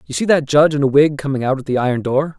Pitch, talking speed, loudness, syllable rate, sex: 140 Hz, 325 wpm, -16 LUFS, 7.0 syllables/s, male